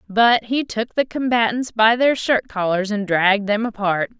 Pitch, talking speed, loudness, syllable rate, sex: 220 Hz, 185 wpm, -19 LUFS, 4.6 syllables/s, female